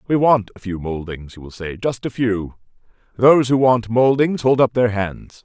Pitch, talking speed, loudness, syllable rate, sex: 115 Hz, 200 wpm, -18 LUFS, 4.9 syllables/s, male